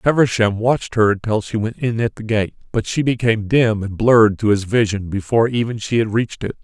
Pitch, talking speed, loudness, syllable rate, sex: 110 Hz, 225 wpm, -18 LUFS, 5.7 syllables/s, male